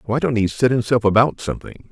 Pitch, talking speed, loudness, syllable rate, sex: 115 Hz, 220 wpm, -18 LUFS, 6.2 syllables/s, male